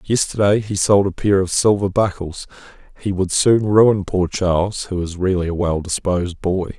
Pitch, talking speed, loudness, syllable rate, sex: 95 Hz, 185 wpm, -18 LUFS, 4.8 syllables/s, male